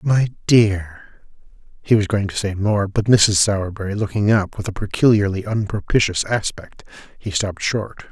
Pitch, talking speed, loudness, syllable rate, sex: 100 Hz, 155 wpm, -19 LUFS, 4.9 syllables/s, male